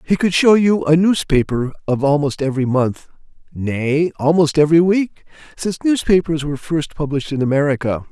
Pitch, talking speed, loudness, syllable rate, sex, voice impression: 155 Hz, 150 wpm, -17 LUFS, 5.4 syllables/s, male, masculine, very adult-like, very middle-aged, slightly thick, slightly tensed, slightly weak, very bright, slightly soft, clear, very fluent, slightly raspy, slightly cool, intellectual, slightly refreshing, sincere, calm, slightly mature, friendly, reassuring, very unique, slightly wild, very lively, kind, slightly intense, slightly sharp